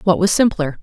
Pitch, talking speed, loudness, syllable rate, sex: 185 Hz, 220 wpm, -16 LUFS, 5.5 syllables/s, female